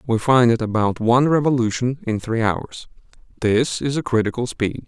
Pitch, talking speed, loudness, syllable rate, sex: 120 Hz, 170 wpm, -19 LUFS, 5.1 syllables/s, male